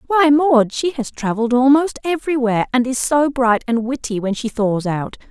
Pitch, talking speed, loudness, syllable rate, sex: 255 Hz, 180 wpm, -17 LUFS, 5.4 syllables/s, female